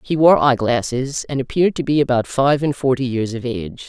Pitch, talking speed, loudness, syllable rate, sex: 130 Hz, 230 wpm, -18 LUFS, 5.6 syllables/s, female